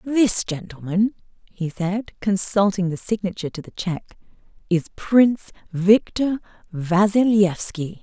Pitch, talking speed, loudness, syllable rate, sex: 195 Hz, 105 wpm, -21 LUFS, 4.4 syllables/s, female